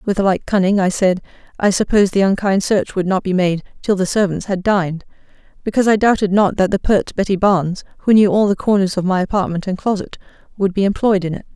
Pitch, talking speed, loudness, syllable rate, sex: 195 Hz, 225 wpm, -16 LUFS, 6.1 syllables/s, female